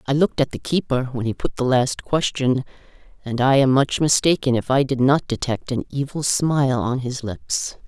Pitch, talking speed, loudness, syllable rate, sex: 135 Hz, 205 wpm, -20 LUFS, 5.0 syllables/s, female